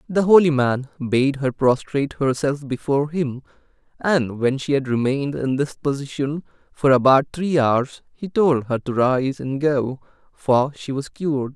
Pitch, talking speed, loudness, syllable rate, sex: 140 Hz, 165 wpm, -20 LUFS, 4.5 syllables/s, male